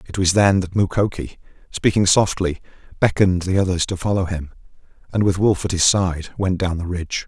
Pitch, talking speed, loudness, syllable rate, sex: 95 Hz, 190 wpm, -19 LUFS, 5.6 syllables/s, male